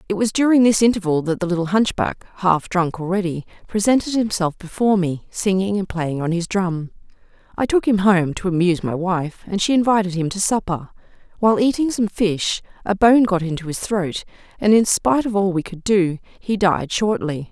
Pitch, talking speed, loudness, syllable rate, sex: 190 Hz, 195 wpm, -19 LUFS, 5.3 syllables/s, female